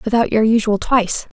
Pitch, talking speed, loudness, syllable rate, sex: 215 Hz, 170 wpm, -16 LUFS, 5.8 syllables/s, female